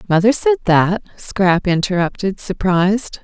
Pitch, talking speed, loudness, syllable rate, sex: 195 Hz, 110 wpm, -16 LUFS, 4.4 syllables/s, female